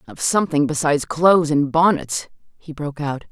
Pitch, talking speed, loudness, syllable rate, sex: 155 Hz, 165 wpm, -19 LUFS, 5.5 syllables/s, female